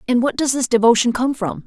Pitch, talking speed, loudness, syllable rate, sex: 245 Hz, 250 wpm, -17 LUFS, 6.0 syllables/s, female